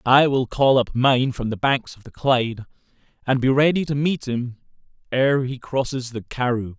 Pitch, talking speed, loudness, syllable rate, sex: 130 Hz, 195 wpm, -21 LUFS, 4.6 syllables/s, male